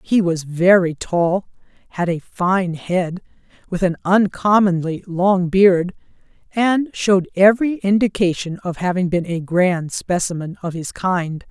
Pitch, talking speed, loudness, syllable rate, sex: 185 Hz, 135 wpm, -18 LUFS, 4.1 syllables/s, female